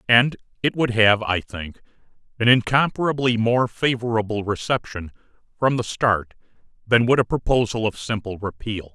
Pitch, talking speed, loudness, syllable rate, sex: 115 Hz, 140 wpm, -21 LUFS, 4.8 syllables/s, male